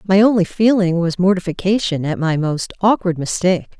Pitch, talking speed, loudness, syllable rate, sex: 185 Hz, 160 wpm, -17 LUFS, 5.3 syllables/s, female